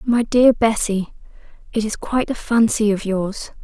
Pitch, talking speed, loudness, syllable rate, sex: 220 Hz, 165 wpm, -19 LUFS, 4.6 syllables/s, female